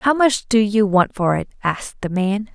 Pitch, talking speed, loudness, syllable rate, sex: 210 Hz, 235 wpm, -19 LUFS, 4.7 syllables/s, female